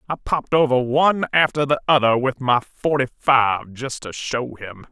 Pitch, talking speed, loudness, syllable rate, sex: 130 Hz, 185 wpm, -19 LUFS, 5.1 syllables/s, male